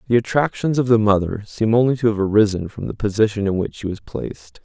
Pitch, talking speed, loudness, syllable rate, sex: 110 Hz, 235 wpm, -19 LUFS, 6.1 syllables/s, male